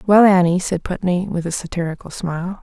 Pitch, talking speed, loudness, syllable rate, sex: 180 Hz, 185 wpm, -19 LUFS, 5.7 syllables/s, female